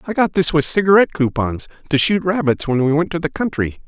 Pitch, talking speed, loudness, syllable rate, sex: 160 Hz, 230 wpm, -17 LUFS, 6.0 syllables/s, male